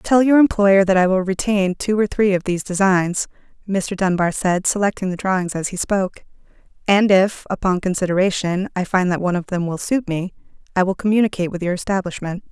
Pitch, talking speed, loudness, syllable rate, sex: 190 Hz, 195 wpm, -19 LUFS, 5.8 syllables/s, female